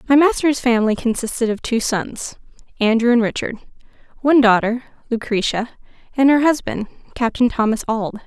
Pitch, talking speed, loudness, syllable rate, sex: 240 Hz, 140 wpm, -18 LUFS, 5.5 syllables/s, female